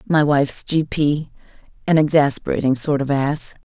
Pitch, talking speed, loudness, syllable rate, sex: 145 Hz, 130 wpm, -18 LUFS, 4.5 syllables/s, female